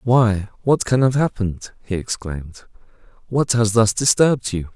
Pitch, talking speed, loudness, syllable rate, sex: 110 Hz, 150 wpm, -19 LUFS, 4.8 syllables/s, male